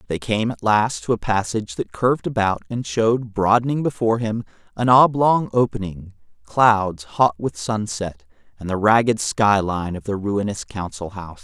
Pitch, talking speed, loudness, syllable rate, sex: 105 Hz, 165 wpm, -20 LUFS, 4.9 syllables/s, male